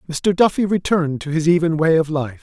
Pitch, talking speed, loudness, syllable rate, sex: 165 Hz, 225 wpm, -18 LUFS, 5.8 syllables/s, male